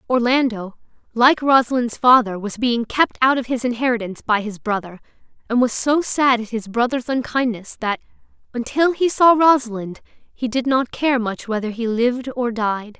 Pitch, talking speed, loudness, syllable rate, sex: 240 Hz, 170 wpm, -19 LUFS, 4.9 syllables/s, female